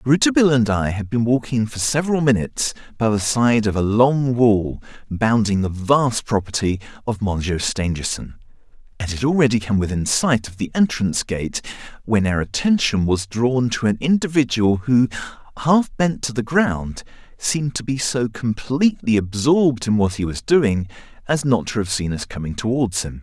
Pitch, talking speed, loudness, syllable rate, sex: 115 Hz, 175 wpm, -19 LUFS, 5.0 syllables/s, male